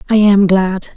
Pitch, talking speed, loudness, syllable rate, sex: 195 Hz, 190 wpm, -12 LUFS, 4.0 syllables/s, female